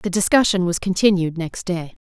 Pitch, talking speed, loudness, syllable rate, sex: 185 Hz, 175 wpm, -19 LUFS, 5.1 syllables/s, female